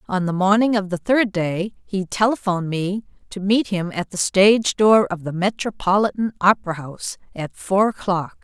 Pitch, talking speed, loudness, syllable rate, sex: 195 Hz, 180 wpm, -20 LUFS, 4.9 syllables/s, female